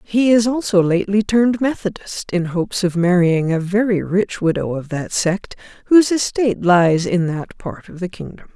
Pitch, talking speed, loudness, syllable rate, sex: 195 Hz, 180 wpm, -17 LUFS, 4.9 syllables/s, female